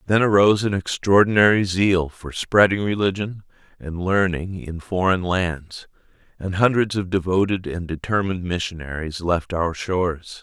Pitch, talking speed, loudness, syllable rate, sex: 95 Hz, 130 wpm, -21 LUFS, 4.7 syllables/s, male